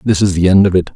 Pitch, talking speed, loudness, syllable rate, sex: 95 Hz, 375 wpm, -12 LUFS, 7.1 syllables/s, male